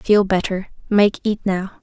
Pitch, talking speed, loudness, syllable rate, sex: 200 Hz, 165 wpm, -19 LUFS, 4.3 syllables/s, female